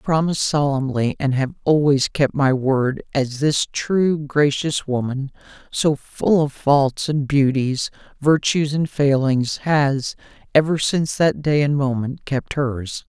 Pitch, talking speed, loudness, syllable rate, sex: 140 Hz, 145 wpm, -20 LUFS, 3.9 syllables/s, male